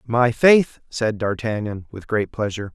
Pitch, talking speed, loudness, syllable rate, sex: 115 Hz, 155 wpm, -20 LUFS, 4.4 syllables/s, male